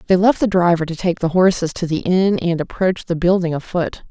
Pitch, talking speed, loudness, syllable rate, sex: 175 Hz, 235 wpm, -18 LUFS, 5.7 syllables/s, female